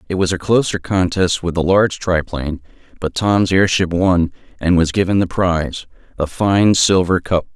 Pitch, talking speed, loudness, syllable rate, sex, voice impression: 90 Hz, 175 wpm, -16 LUFS, 4.9 syllables/s, male, masculine, very adult-like, slightly thick, cool, slightly intellectual, calm